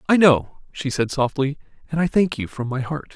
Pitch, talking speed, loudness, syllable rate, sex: 145 Hz, 230 wpm, -21 LUFS, 5.1 syllables/s, male